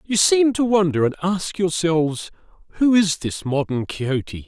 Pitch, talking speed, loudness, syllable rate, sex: 165 Hz, 160 wpm, -20 LUFS, 4.7 syllables/s, male